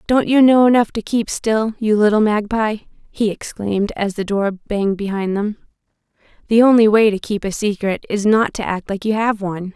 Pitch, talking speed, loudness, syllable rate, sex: 210 Hz, 205 wpm, -17 LUFS, 5.1 syllables/s, female